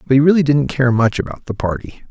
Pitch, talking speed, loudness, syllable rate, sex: 130 Hz, 255 wpm, -16 LUFS, 6.2 syllables/s, male